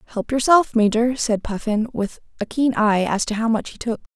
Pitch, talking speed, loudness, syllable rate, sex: 225 Hz, 215 wpm, -20 LUFS, 5.0 syllables/s, female